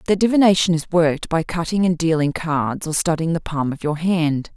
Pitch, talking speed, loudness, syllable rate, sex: 165 Hz, 210 wpm, -19 LUFS, 5.3 syllables/s, female